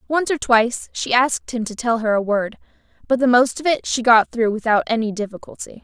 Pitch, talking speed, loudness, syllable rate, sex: 235 Hz, 225 wpm, -19 LUFS, 5.6 syllables/s, female